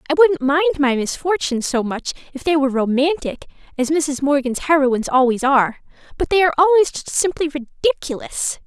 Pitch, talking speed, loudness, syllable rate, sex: 290 Hz, 165 wpm, -18 LUFS, 5.6 syllables/s, female